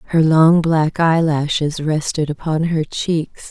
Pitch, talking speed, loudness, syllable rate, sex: 155 Hz, 135 wpm, -17 LUFS, 3.7 syllables/s, female